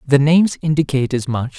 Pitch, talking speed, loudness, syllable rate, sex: 140 Hz, 190 wpm, -16 LUFS, 6.0 syllables/s, male